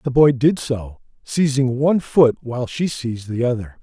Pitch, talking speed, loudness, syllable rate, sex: 130 Hz, 190 wpm, -19 LUFS, 4.9 syllables/s, male